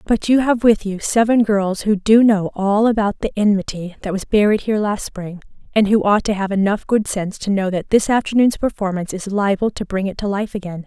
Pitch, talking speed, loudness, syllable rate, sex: 205 Hz, 230 wpm, -18 LUFS, 5.6 syllables/s, female